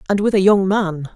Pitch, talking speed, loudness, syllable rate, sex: 195 Hz, 260 wpm, -16 LUFS, 5.3 syllables/s, female